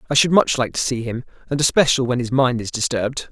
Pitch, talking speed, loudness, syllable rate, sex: 130 Hz, 255 wpm, -19 LUFS, 6.3 syllables/s, male